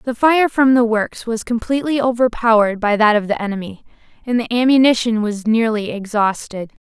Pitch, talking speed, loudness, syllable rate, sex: 230 Hz, 165 wpm, -16 LUFS, 5.4 syllables/s, female